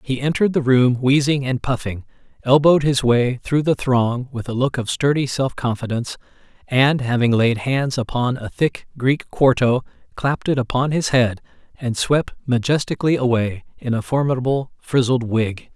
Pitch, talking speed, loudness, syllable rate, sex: 130 Hz, 165 wpm, -19 LUFS, 4.9 syllables/s, male